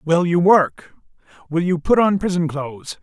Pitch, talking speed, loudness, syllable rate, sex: 170 Hz, 160 wpm, -18 LUFS, 4.6 syllables/s, female